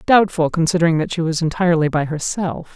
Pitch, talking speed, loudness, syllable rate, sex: 165 Hz, 175 wpm, -18 LUFS, 6.0 syllables/s, female